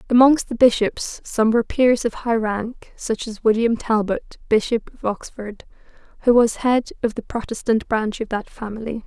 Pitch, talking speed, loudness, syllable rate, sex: 225 Hz, 170 wpm, -20 LUFS, 4.6 syllables/s, female